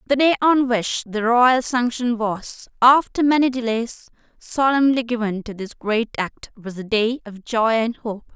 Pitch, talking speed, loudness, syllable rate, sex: 235 Hz, 170 wpm, -20 LUFS, 4.2 syllables/s, female